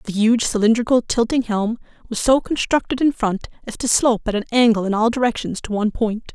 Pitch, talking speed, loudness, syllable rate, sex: 230 Hz, 210 wpm, -19 LUFS, 6.0 syllables/s, female